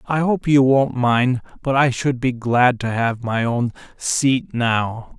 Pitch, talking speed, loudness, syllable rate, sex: 125 Hz, 185 wpm, -19 LUFS, 3.5 syllables/s, male